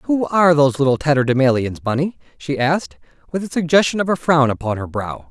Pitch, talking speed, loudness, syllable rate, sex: 145 Hz, 190 wpm, -18 LUFS, 6.1 syllables/s, male